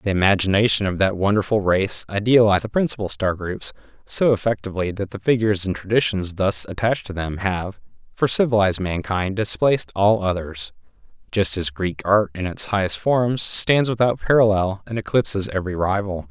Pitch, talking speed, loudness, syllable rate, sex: 100 Hz, 160 wpm, -20 LUFS, 5.5 syllables/s, male